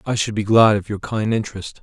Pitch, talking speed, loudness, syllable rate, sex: 105 Hz, 265 wpm, -18 LUFS, 5.9 syllables/s, male